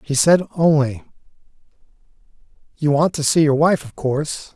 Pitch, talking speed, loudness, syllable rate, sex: 150 Hz, 145 wpm, -18 LUFS, 4.9 syllables/s, male